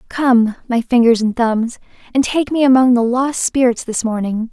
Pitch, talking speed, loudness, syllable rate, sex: 245 Hz, 185 wpm, -15 LUFS, 4.7 syllables/s, female